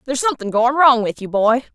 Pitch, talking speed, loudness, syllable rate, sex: 245 Hz, 240 wpm, -16 LUFS, 6.6 syllables/s, female